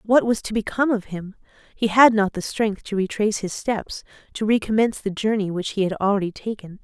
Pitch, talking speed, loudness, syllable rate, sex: 210 Hz, 210 wpm, -22 LUFS, 5.8 syllables/s, female